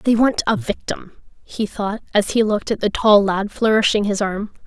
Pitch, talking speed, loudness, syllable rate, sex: 210 Hz, 205 wpm, -19 LUFS, 4.8 syllables/s, female